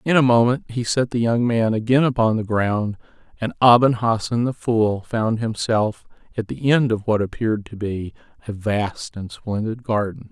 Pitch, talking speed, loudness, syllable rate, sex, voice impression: 115 Hz, 185 wpm, -20 LUFS, 4.6 syllables/s, male, very masculine, very adult-like, middle-aged, very thick, very tensed, very powerful, bright, slightly soft, slightly muffled, slightly fluent, very cool, very intellectual, slightly refreshing, sincere, calm, very mature, friendly, reassuring, very wild, slightly sweet, slightly lively, kind